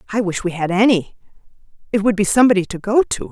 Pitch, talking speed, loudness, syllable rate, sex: 205 Hz, 200 wpm, -17 LUFS, 6.8 syllables/s, female